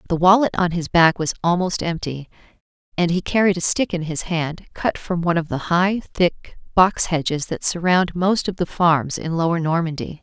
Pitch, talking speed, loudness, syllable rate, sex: 170 Hz, 200 wpm, -20 LUFS, 4.9 syllables/s, female